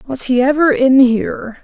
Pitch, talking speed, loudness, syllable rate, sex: 260 Hz, 185 wpm, -13 LUFS, 4.7 syllables/s, female